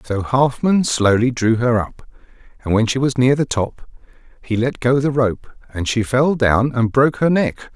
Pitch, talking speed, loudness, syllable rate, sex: 125 Hz, 200 wpm, -17 LUFS, 4.7 syllables/s, male